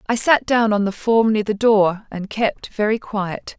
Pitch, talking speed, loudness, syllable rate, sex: 215 Hz, 220 wpm, -18 LUFS, 4.1 syllables/s, female